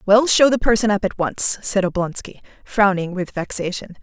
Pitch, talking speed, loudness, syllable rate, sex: 200 Hz, 180 wpm, -19 LUFS, 5.0 syllables/s, female